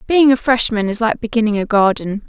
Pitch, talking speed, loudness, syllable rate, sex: 225 Hz, 210 wpm, -15 LUFS, 5.7 syllables/s, female